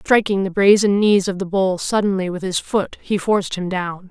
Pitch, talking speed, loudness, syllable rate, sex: 190 Hz, 220 wpm, -18 LUFS, 5.0 syllables/s, female